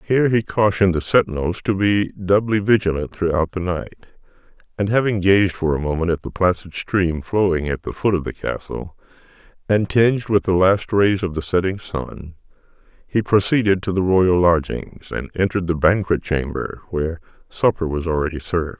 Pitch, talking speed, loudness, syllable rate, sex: 90 Hz, 175 wpm, -20 LUFS, 5.2 syllables/s, male